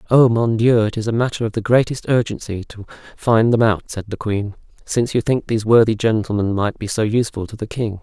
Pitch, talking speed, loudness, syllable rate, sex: 110 Hz, 230 wpm, -18 LUFS, 5.9 syllables/s, male